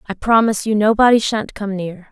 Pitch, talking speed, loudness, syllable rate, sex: 210 Hz, 200 wpm, -16 LUFS, 5.6 syllables/s, female